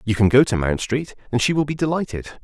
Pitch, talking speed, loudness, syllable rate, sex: 125 Hz, 270 wpm, -20 LUFS, 6.5 syllables/s, male